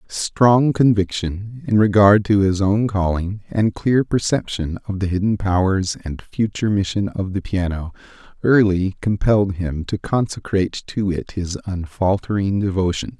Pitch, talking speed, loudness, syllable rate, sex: 100 Hz, 140 wpm, -19 LUFS, 4.4 syllables/s, male